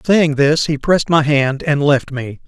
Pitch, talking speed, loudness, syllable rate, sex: 150 Hz, 220 wpm, -15 LUFS, 4.4 syllables/s, male